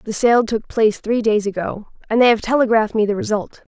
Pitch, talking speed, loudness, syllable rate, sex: 220 Hz, 210 wpm, -18 LUFS, 5.8 syllables/s, female